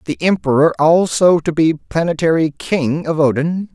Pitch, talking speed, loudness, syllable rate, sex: 160 Hz, 145 wpm, -15 LUFS, 4.5 syllables/s, male